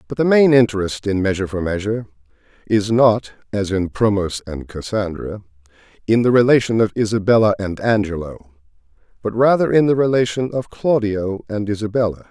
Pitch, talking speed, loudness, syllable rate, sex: 110 Hz, 150 wpm, -18 LUFS, 5.6 syllables/s, male